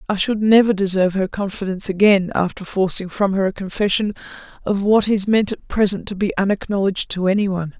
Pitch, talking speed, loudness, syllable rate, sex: 195 Hz, 190 wpm, -18 LUFS, 6.2 syllables/s, female